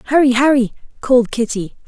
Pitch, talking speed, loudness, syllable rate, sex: 250 Hz, 130 wpm, -15 LUFS, 6.3 syllables/s, female